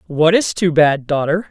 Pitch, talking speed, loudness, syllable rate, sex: 160 Hz, 200 wpm, -15 LUFS, 4.4 syllables/s, female